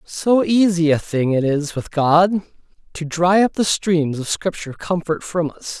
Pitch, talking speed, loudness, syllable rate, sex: 170 Hz, 185 wpm, -18 LUFS, 4.2 syllables/s, male